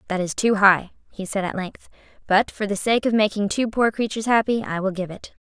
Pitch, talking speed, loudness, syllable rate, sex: 205 Hz, 245 wpm, -21 LUFS, 5.7 syllables/s, female